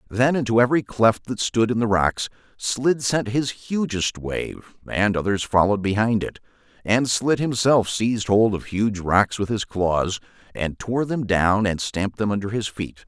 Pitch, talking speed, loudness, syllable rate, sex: 110 Hz, 185 wpm, -22 LUFS, 4.6 syllables/s, male